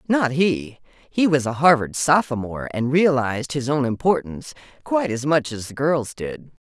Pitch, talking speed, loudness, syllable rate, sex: 135 Hz, 170 wpm, -21 LUFS, 4.9 syllables/s, female